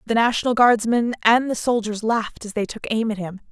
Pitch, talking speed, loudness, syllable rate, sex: 225 Hz, 220 wpm, -20 LUFS, 5.8 syllables/s, female